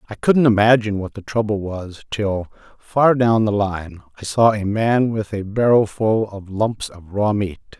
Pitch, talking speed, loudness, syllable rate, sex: 105 Hz, 185 wpm, -19 LUFS, 4.3 syllables/s, male